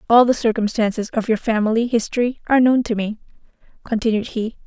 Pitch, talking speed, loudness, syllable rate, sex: 225 Hz, 165 wpm, -19 LUFS, 6.2 syllables/s, female